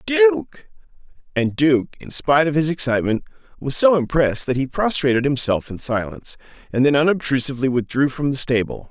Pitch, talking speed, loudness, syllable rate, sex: 135 Hz, 160 wpm, -19 LUFS, 5.7 syllables/s, male